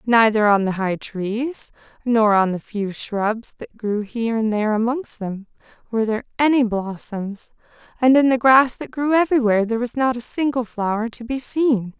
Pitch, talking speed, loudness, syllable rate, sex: 230 Hz, 185 wpm, -20 LUFS, 5.0 syllables/s, female